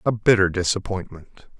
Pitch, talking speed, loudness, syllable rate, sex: 100 Hz, 115 wpm, -21 LUFS, 4.9 syllables/s, male